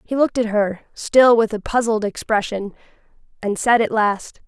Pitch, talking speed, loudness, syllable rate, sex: 220 Hz, 175 wpm, -19 LUFS, 4.8 syllables/s, female